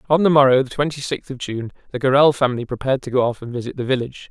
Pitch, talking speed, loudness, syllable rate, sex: 130 Hz, 265 wpm, -19 LUFS, 7.5 syllables/s, male